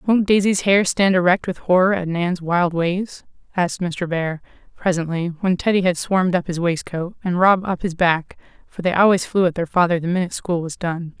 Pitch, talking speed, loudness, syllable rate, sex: 180 Hz, 210 wpm, -19 LUFS, 5.2 syllables/s, female